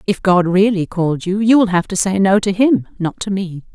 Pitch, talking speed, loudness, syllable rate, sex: 190 Hz, 240 wpm, -15 LUFS, 5.0 syllables/s, female